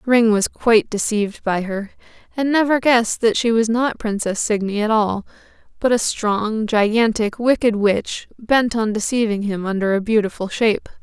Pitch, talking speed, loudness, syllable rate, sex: 220 Hz, 170 wpm, -18 LUFS, 4.8 syllables/s, female